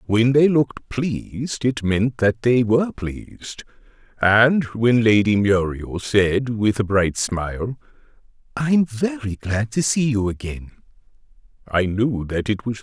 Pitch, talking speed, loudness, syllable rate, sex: 115 Hz, 150 wpm, -20 LUFS, 3.9 syllables/s, male